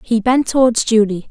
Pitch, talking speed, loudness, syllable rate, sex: 230 Hz, 185 wpm, -14 LUFS, 5.0 syllables/s, female